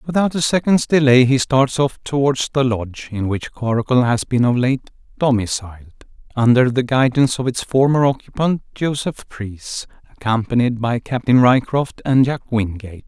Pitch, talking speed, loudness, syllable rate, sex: 125 Hz, 145 wpm, -17 LUFS, 5.1 syllables/s, male